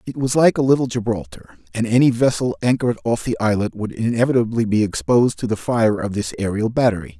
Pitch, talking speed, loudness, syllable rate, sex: 115 Hz, 200 wpm, -19 LUFS, 6.1 syllables/s, male